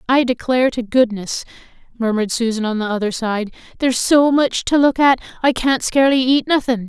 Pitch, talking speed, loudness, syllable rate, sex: 245 Hz, 185 wpm, -17 LUFS, 5.7 syllables/s, female